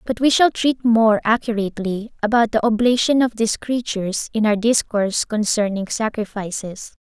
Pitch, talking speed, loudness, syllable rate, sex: 220 Hz, 145 wpm, -19 LUFS, 5.1 syllables/s, female